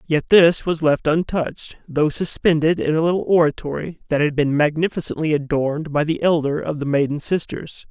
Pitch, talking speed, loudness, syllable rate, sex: 155 Hz, 175 wpm, -19 LUFS, 5.4 syllables/s, male